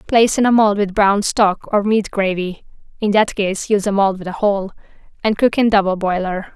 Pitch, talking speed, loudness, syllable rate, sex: 200 Hz, 220 wpm, -17 LUFS, 4.1 syllables/s, female